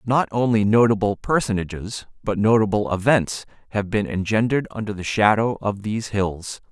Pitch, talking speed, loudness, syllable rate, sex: 105 Hz, 145 wpm, -21 LUFS, 5.1 syllables/s, male